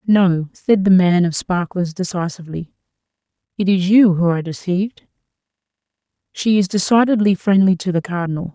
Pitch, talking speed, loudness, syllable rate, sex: 185 Hz, 140 wpm, -17 LUFS, 5.4 syllables/s, female